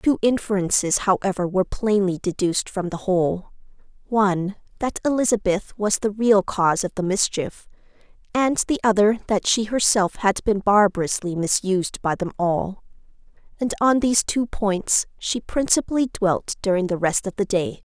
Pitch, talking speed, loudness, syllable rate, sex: 200 Hz, 155 wpm, -21 LUFS, 4.9 syllables/s, female